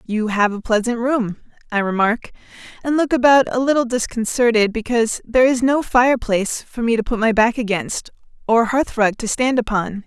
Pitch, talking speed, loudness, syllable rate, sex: 235 Hz, 180 wpm, -18 LUFS, 5.4 syllables/s, female